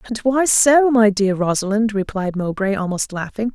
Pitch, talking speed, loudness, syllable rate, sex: 215 Hz, 170 wpm, -17 LUFS, 4.8 syllables/s, female